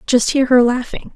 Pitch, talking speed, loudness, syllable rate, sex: 250 Hz, 210 wpm, -15 LUFS, 4.9 syllables/s, female